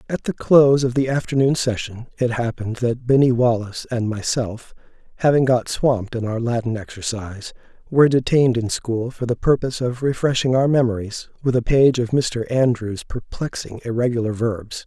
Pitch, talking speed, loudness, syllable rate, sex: 120 Hz, 165 wpm, -20 LUFS, 5.3 syllables/s, male